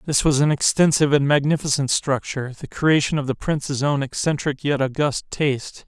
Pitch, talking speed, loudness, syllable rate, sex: 140 Hz, 175 wpm, -20 LUFS, 5.5 syllables/s, male